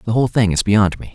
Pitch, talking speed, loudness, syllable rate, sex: 105 Hz, 315 wpm, -16 LUFS, 6.8 syllables/s, male